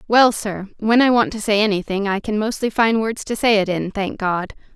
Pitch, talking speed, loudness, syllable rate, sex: 210 Hz, 240 wpm, -19 LUFS, 5.2 syllables/s, female